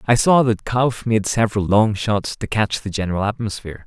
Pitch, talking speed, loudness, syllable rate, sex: 105 Hz, 200 wpm, -19 LUFS, 5.4 syllables/s, male